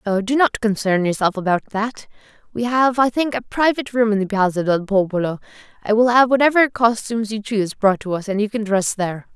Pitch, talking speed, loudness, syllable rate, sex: 220 Hz, 210 wpm, -19 LUFS, 6.0 syllables/s, female